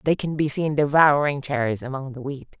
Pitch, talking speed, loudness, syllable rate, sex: 140 Hz, 210 wpm, -22 LUFS, 5.3 syllables/s, female